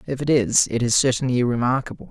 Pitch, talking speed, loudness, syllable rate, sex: 125 Hz, 200 wpm, -20 LUFS, 6.2 syllables/s, male